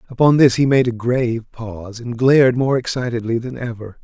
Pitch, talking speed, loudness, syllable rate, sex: 120 Hz, 195 wpm, -17 LUFS, 5.5 syllables/s, male